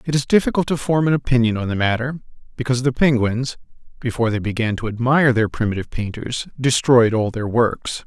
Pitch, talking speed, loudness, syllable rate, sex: 120 Hz, 185 wpm, -19 LUFS, 6.1 syllables/s, male